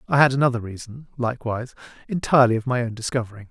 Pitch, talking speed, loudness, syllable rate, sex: 120 Hz, 170 wpm, -22 LUFS, 7.5 syllables/s, male